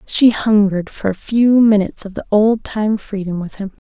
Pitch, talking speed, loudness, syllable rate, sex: 205 Hz, 200 wpm, -16 LUFS, 5.0 syllables/s, female